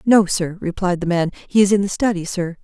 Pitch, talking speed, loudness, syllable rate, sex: 185 Hz, 250 wpm, -19 LUFS, 5.4 syllables/s, female